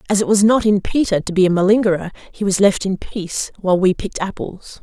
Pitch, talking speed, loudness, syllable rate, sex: 195 Hz, 235 wpm, -17 LUFS, 6.1 syllables/s, female